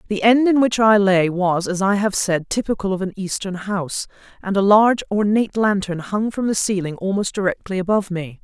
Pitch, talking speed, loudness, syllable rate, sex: 200 Hz, 205 wpm, -19 LUFS, 5.5 syllables/s, female